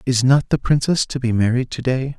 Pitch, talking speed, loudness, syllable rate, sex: 130 Hz, 245 wpm, -18 LUFS, 5.3 syllables/s, male